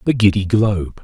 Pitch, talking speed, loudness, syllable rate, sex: 100 Hz, 175 wpm, -16 LUFS, 5.6 syllables/s, male